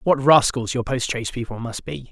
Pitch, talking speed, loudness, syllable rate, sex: 125 Hz, 225 wpm, -21 LUFS, 5.5 syllables/s, male